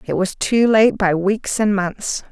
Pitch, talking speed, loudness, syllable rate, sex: 205 Hz, 205 wpm, -17 LUFS, 3.7 syllables/s, female